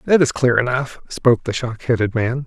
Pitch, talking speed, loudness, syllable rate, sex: 125 Hz, 220 wpm, -18 LUFS, 5.3 syllables/s, male